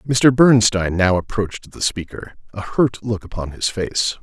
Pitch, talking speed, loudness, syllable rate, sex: 105 Hz, 170 wpm, -18 LUFS, 4.8 syllables/s, male